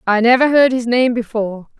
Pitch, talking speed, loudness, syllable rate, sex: 235 Hz, 200 wpm, -15 LUFS, 5.7 syllables/s, female